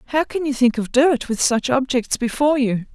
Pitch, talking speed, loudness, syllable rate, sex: 260 Hz, 225 wpm, -19 LUFS, 5.3 syllables/s, female